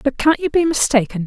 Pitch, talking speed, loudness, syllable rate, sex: 275 Hz, 235 wpm, -16 LUFS, 6.0 syllables/s, female